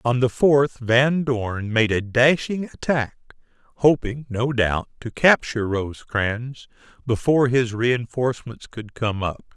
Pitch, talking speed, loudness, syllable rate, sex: 120 Hz, 130 wpm, -21 LUFS, 4.0 syllables/s, male